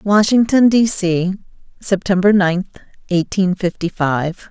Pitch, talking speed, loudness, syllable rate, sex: 190 Hz, 105 wpm, -16 LUFS, 3.9 syllables/s, female